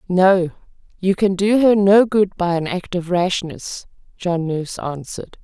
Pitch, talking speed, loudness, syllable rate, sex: 185 Hz, 165 wpm, -18 LUFS, 4.3 syllables/s, female